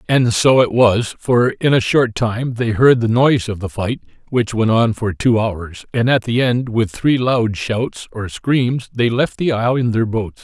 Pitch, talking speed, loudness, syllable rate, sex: 115 Hz, 225 wpm, -16 LUFS, 4.2 syllables/s, male